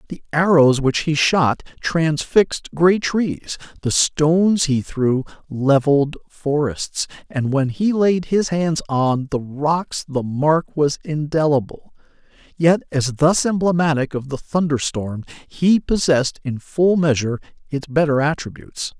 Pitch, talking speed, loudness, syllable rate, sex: 150 Hz, 135 wpm, -19 LUFS, 4.0 syllables/s, male